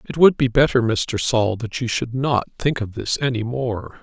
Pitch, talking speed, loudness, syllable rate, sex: 120 Hz, 225 wpm, -20 LUFS, 4.6 syllables/s, male